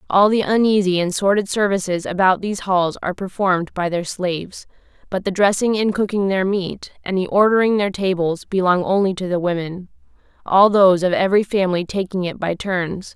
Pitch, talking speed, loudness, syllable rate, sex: 190 Hz, 180 wpm, -18 LUFS, 5.5 syllables/s, female